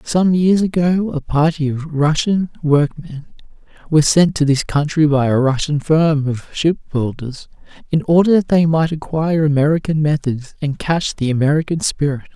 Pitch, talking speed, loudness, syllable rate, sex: 155 Hz, 155 wpm, -16 LUFS, 4.7 syllables/s, male